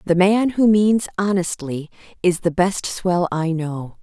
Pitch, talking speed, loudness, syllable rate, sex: 180 Hz, 165 wpm, -19 LUFS, 3.8 syllables/s, female